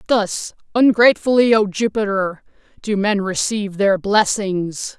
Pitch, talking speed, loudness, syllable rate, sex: 205 Hz, 110 wpm, -17 LUFS, 4.3 syllables/s, female